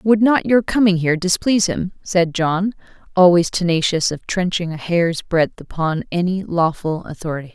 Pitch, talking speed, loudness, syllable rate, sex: 175 Hz, 160 wpm, -18 LUFS, 4.9 syllables/s, female